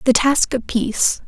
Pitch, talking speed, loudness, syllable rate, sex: 245 Hz, 190 wpm, -18 LUFS, 4.5 syllables/s, female